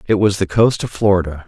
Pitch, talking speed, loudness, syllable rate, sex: 100 Hz, 245 wpm, -16 LUFS, 6.1 syllables/s, male